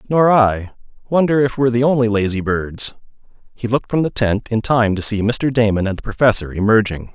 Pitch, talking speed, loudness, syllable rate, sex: 115 Hz, 200 wpm, -17 LUFS, 5.7 syllables/s, male